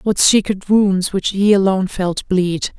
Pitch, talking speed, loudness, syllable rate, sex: 195 Hz, 170 wpm, -16 LUFS, 4.1 syllables/s, female